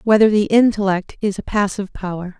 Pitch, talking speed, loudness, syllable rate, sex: 200 Hz, 175 wpm, -18 LUFS, 5.8 syllables/s, female